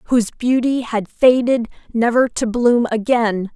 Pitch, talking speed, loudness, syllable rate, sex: 235 Hz, 135 wpm, -17 LUFS, 4.3 syllables/s, female